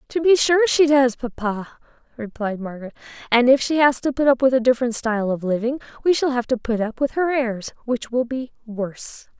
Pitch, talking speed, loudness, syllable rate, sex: 250 Hz, 215 wpm, -20 LUFS, 5.5 syllables/s, female